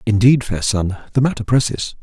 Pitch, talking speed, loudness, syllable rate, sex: 115 Hz, 180 wpm, -17 LUFS, 5.3 syllables/s, male